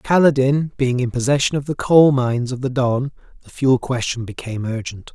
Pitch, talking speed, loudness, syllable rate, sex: 130 Hz, 185 wpm, -18 LUFS, 5.3 syllables/s, male